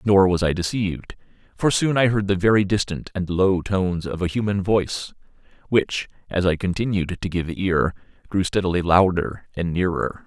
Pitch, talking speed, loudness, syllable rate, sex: 95 Hz, 175 wpm, -22 LUFS, 5.0 syllables/s, male